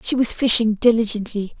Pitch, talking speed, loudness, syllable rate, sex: 225 Hz, 150 wpm, -18 LUFS, 5.4 syllables/s, female